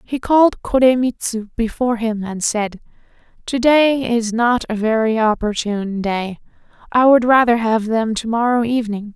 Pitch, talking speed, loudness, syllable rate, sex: 230 Hz, 150 wpm, -17 LUFS, 4.7 syllables/s, female